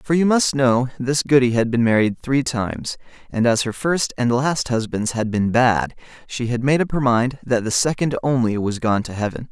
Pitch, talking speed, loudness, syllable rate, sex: 125 Hz, 220 wpm, -19 LUFS, 4.9 syllables/s, male